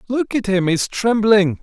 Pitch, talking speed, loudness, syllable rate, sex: 205 Hz, 185 wpm, -17 LUFS, 4.1 syllables/s, male